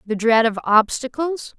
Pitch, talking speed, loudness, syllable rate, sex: 240 Hz, 150 wpm, -18 LUFS, 4.3 syllables/s, female